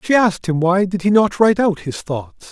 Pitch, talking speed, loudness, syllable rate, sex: 185 Hz, 260 wpm, -17 LUFS, 5.4 syllables/s, male